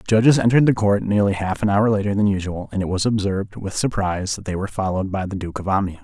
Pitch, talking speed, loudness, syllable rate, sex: 100 Hz, 270 wpm, -20 LUFS, 7.1 syllables/s, male